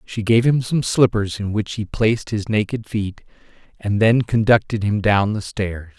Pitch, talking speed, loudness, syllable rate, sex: 105 Hz, 190 wpm, -19 LUFS, 4.5 syllables/s, male